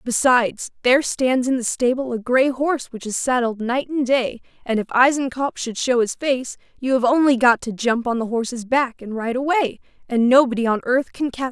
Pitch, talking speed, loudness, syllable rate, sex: 250 Hz, 220 wpm, -20 LUFS, 5.2 syllables/s, female